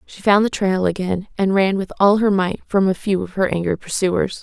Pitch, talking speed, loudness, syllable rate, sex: 190 Hz, 245 wpm, -18 LUFS, 5.1 syllables/s, female